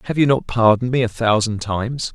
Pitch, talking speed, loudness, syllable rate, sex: 115 Hz, 225 wpm, -18 LUFS, 6.1 syllables/s, male